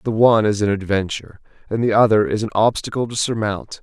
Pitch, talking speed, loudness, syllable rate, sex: 110 Hz, 205 wpm, -18 LUFS, 6.2 syllables/s, male